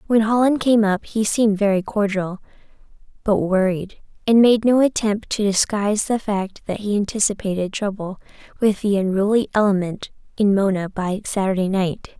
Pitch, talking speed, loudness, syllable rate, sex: 205 Hz, 155 wpm, -20 LUFS, 5.1 syllables/s, female